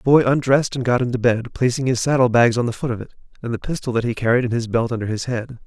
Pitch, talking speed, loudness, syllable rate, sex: 120 Hz, 295 wpm, -20 LUFS, 6.9 syllables/s, male